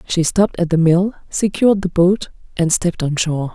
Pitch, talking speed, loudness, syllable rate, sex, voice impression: 175 Hz, 205 wpm, -17 LUFS, 5.7 syllables/s, female, gender-neutral, adult-like, slightly weak, soft, very calm, reassuring, kind